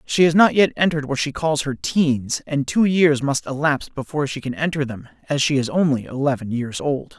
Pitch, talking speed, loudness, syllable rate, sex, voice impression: 145 Hz, 225 wpm, -20 LUFS, 5.4 syllables/s, male, very masculine, very adult-like, slightly thick, tensed, powerful, slightly dark, slightly hard, clear, fluent, cool, very intellectual, refreshing, very sincere, calm, friendly, reassuring, slightly unique, slightly elegant, wild, slightly sweet, lively, strict, slightly intense